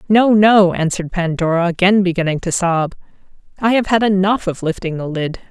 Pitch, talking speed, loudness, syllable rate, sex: 185 Hz, 175 wpm, -16 LUFS, 5.4 syllables/s, female